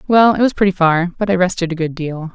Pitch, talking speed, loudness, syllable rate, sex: 180 Hz, 280 wpm, -16 LUFS, 6.0 syllables/s, female